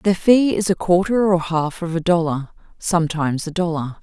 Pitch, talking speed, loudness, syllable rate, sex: 175 Hz, 195 wpm, -19 LUFS, 5.1 syllables/s, female